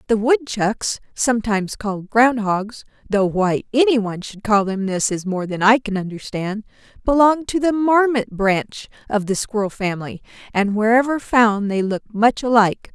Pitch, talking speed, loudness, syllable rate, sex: 220 Hz, 165 wpm, -19 LUFS, 4.8 syllables/s, female